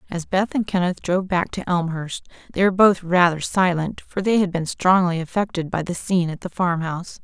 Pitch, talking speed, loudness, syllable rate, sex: 180 Hz, 215 wpm, -21 LUFS, 5.6 syllables/s, female